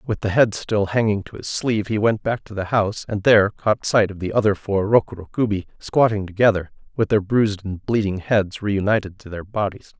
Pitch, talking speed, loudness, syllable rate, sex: 105 Hz, 215 wpm, -20 LUFS, 5.5 syllables/s, male